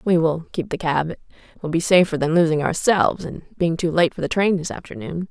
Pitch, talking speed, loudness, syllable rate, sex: 165 Hz, 240 wpm, -20 LUFS, 5.9 syllables/s, female